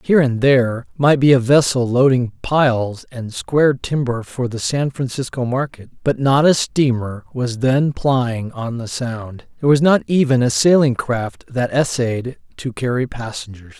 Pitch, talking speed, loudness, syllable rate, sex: 125 Hz, 170 wpm, -17 LUFS, 4.4 syllables/s, male